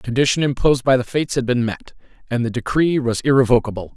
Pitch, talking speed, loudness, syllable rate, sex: 125 Hz, 210 wpm, -18 LUFS, 7.1 syllables/s, male